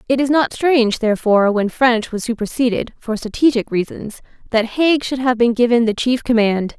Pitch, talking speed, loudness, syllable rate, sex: 235 Hz, 185 wpm, -17 LUFS, 5.3 syllables/s, female